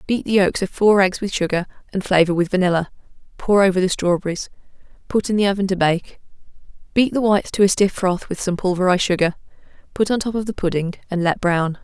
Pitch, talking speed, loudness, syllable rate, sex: 190 Hz, 215 wpm, -19 LUFS, 6.3 syllables/s, female